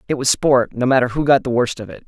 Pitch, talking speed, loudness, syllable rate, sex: 125 Hz, 320 wpm, -17 LUFS, 6.5 syllables/s, male